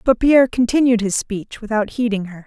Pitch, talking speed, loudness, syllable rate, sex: 225 Hz, 195 wpm, -18 LUFS, 5.5 syllables/s, female